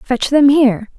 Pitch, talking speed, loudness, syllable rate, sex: 260 Hz, 185 wpm, -12 LUFS, 4.5 syllables/s, female